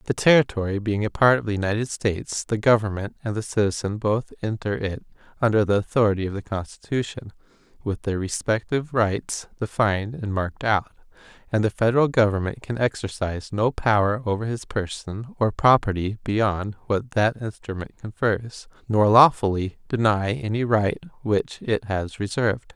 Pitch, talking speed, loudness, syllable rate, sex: 110 Hz, 155 wpm, -23 LUFS, 5.3 syllables/s, male